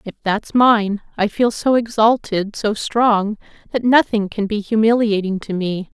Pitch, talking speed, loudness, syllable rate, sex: 215 Hz, 160 wpm, -17 LUFS, 4.2 syllables/s, female